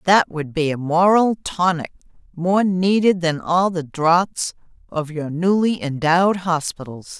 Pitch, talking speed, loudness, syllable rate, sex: 170 Hz, 140 wpm, -19 LUFS, 4.0 syllables/s, female